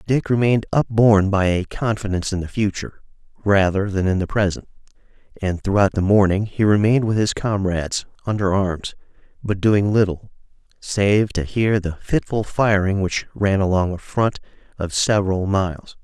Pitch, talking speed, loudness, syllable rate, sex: 100 Hz, 155 wpm, -20 LUFS, 5.1 syllables/s, male